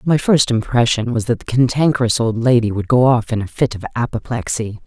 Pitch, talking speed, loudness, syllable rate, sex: 120 Hz, 210 wpm, -17 LUFS, 5.6 syllables/s, female